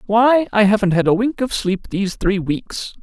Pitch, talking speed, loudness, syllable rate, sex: 210 Hz, 220 wpm, -17 LUFS, 4.7 syllables/s, male